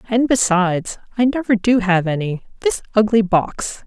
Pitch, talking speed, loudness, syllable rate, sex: 205 Hz, 155 wpm, -18 LUFS, 4.6 syllables/s, female